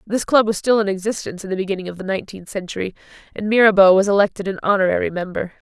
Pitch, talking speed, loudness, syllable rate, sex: 195 Hz, 210 wpm, -19 LUFS, 7.4 syllables/s, female